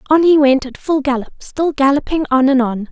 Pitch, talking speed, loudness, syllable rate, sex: 275 Hz, 225 wpm, -15 LUFS, 5.3 syllables/s, female